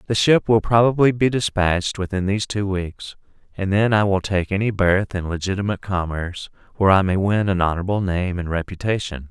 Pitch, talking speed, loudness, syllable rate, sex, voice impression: 100 Hz, 185 wpm, -20 LUFS, 5.8 syllables/s, male, very masculine, old, very thick, relaxed, very powerful, slightly bright, soft, slightly muffled, fluent, very cool, very intellectual, very sincere, very calm, very mature, friendly, reassuring, very unique, elegant, slightly wild, sweet, slightly lively, very kind, slightly modest